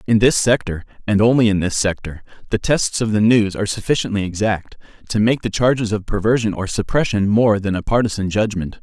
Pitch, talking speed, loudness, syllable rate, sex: 105 Hz, 195 wpm, -18 LUFS, 5.7 syllables/s, male